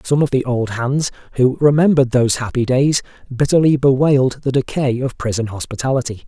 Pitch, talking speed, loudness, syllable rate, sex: 130 Hz, 160 wpm, -17 LUFS, 5.7 syllables/s, male